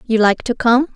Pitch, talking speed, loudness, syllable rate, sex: 235 Hz, 250 wpm, -15 LUFS, 5.0 syllables/s, female